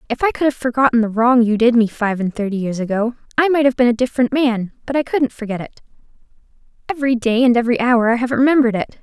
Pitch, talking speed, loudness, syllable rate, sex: 240 Hz, 240 wpm, -17 LUFS, 6.8 syllables/s, female